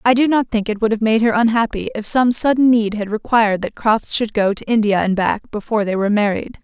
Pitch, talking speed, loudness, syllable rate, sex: 220 Hz, 255 wpm, -17 LUFS, 5.9 syllables/s, female